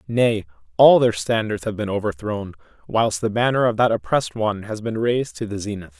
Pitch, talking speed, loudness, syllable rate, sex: 115 Hz, 200 wpm, -21 LUFS, 5.8 syllables/s, male